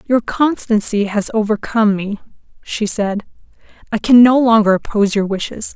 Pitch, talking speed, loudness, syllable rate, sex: 215 Hz, 145 wpm, -15 LUFS, 5.1 syllables/s, female